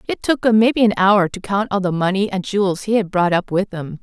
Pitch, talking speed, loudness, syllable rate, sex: 200 Hz, 285 wpm, -17 LUFS, 5.7 syllables/s, female